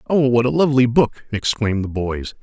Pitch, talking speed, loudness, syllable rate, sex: 120 Hz, 200 wpm, -18 LUFS, 5.5 syllables/s, male